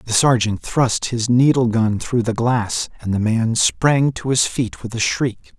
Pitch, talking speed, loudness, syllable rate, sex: 120 Hz, 205 wpm, -18 LUFS, 4.0 syllables/s, male